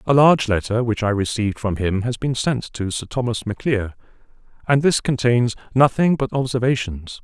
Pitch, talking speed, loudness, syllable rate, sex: 120 Hz, 175 wpm, -20 LUFS, 5.2 syllables/s, male